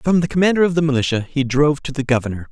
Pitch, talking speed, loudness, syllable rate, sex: 145 Hz, 260 wpm, -18 LUFS, 7.4 syllables/s, male